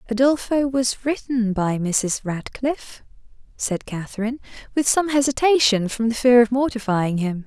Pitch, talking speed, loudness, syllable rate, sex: 235 Hz, 135 wpm, -21 LUFS, 4.7 syllables/s, female